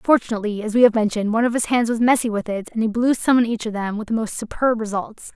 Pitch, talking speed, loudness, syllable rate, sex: 225 Hz, 290 wpm, -20 LUFS, 6.9 syllables/s, female